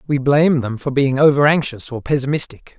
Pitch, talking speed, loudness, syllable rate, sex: 140 Hz, 195 wpm, -16 LUFS, 5.7 syllables/s, male